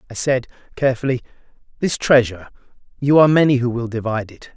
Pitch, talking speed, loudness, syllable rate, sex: 125 Hz, 145 wpm, -18 LUFS, 7.2 syllables/s, male